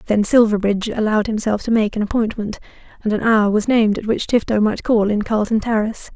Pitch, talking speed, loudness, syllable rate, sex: 215 Hz, 205 wpm, -18 LUFS, 6.2 syllables/s, female